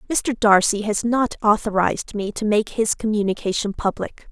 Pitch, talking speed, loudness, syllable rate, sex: 215 Hz, 155 wpm, -20 LUFS, 4.9 syllables/s, female